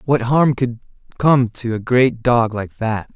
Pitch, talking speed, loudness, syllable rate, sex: 120 Hz, 190 wpm, -17 LUFS, 3.8 syllables/s, male